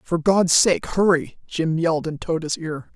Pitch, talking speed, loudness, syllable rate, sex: 165 Hz, 185 wpm, -20 LUFS, 4.3 syllables/s, female